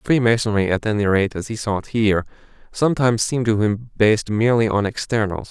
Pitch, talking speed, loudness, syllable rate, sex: 110 Hz, 185 wpm, -19 LUFS, 6.3 syllables/s, male